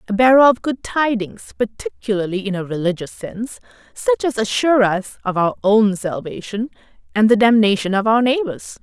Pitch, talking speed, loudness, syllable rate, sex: 220 Hz, 165 wpm, -18 LUFS, 4.7 syllables/s, female